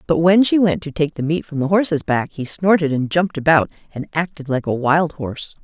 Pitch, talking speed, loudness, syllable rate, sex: 160 Hz, 245 wpm, -18 LUFS, 5.6 syllables/s, female